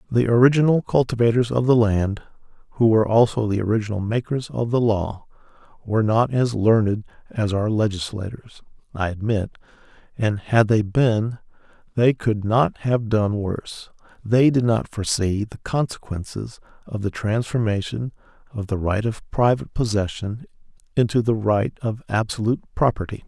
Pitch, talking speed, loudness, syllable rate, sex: 110 Hz, 140 wpm, -21 LUFS, 5.0 syllables/s, male